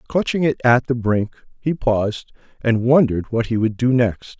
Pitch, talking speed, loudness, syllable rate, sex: 120 Hz, 190 wpm, -19 LUFS, 4.7 syllables/s, male